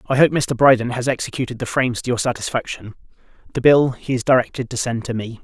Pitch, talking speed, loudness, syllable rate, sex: 125 Hz, 220 wpm, -19 LUFS, 6.4 syllables/s, male